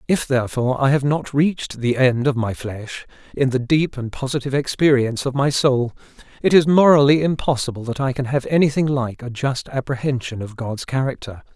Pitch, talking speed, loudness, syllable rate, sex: 135 Hz, 190 wpm, -19 LUFS, 5.5 syllables/s, male